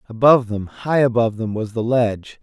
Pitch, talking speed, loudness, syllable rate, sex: 115 Hz, 150 wpm, -18 LUFS, 5.8 syllables/s, male